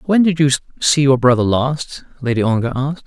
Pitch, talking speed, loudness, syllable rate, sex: 135 Hz, 195 wpm, -16 LUFS, 5.7 syllables/s, male